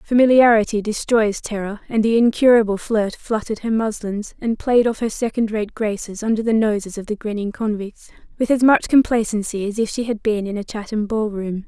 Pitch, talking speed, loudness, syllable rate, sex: 215 Hz, 195 wpm, -19 LUFS, 5.4 syllables/s, female